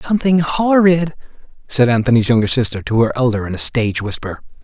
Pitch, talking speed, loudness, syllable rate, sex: 130 Hz, 170 wpm, -15 LUFS, 6.3 syllables/s, male